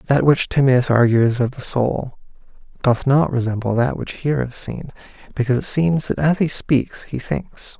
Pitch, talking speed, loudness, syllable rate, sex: 130 Hz, 185 wpm, -19 LUFS, 4.6 syllables/s, male